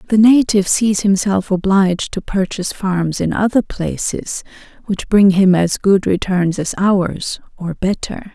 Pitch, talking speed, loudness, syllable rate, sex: 195 Hz, 150 wpm, -16 LUFS, 4.3 syllables/s, female